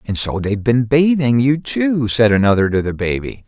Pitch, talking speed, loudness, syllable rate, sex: 120 Hz, 205 wpm, -16 LUFS, 5.1 syllables/s, male